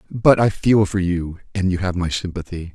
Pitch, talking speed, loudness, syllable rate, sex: 95 Hz, 220 wpm, -19 LUFS, 5.0 syllables/s, male